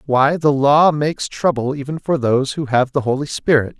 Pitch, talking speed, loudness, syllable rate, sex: 140 Hz, 205 wpm, -17 LUFS, 5.2 syllables/s, male